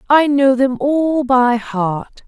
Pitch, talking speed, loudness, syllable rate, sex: 260 Hz, 160 wpm, -15 LUFS, 2.9 syllables/s, female